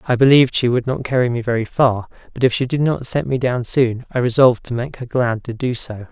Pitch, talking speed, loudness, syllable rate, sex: 125 Hz, 265 wpm, -18 LUFS, 5.8 syllables/s, male